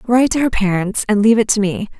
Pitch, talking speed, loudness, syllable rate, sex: 215 Hz, 270 wpm, -15 LUFS, 6.8 syllables/s, female